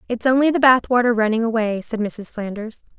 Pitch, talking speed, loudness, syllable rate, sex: 230 Hz, 200 wpm, -19 LUFS, 5.7 syllables/s, female